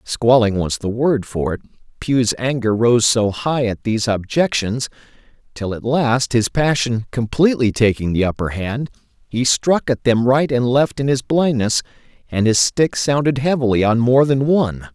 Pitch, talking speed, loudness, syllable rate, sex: 120 Hz, 175 wpm, -17 LUFS, 4.6 syllables/s, male